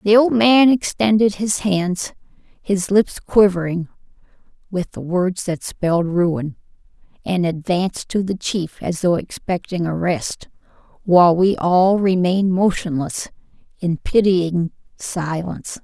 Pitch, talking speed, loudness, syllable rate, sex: 185 Hz, 120 wpm, -18 LUFS, 4.0 syllables/s, female